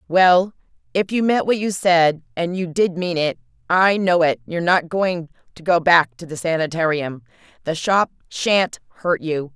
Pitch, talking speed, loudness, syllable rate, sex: 170 Hz, 170 wpm, -19 LUFS, 4.5 syllables/s, female